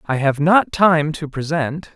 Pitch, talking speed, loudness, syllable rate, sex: 155 Hz, 185 wpm, -17 LUFS, 3.9 syllables/s, male